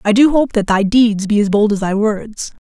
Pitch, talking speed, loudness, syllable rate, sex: 215 Hz, 270 wpm, -14 LUFS, 4.9 syllables/s, female